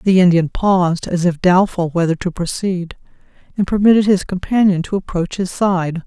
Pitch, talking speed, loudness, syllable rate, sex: 180 Hz, 170 wpm, -16 LUFS, 5.0 syllables/s, female